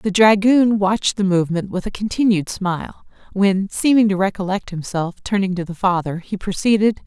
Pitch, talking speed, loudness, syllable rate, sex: 195 Hz, 170 wpm, -18 LUFS, 5.2 syllables/s, female